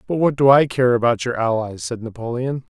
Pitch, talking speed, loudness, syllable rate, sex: 125 Hz, 220 wpm, -19 LUFS, 5.6 syllables/s, male